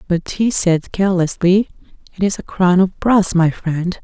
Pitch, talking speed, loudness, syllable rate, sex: 185 Hz, 180 wpm, -16 LUFS, 4.5 syllables/s, female